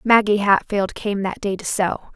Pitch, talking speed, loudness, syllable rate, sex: 200 Hz, 195 wpm, -20 LUFS, 4.4 syllables/s, female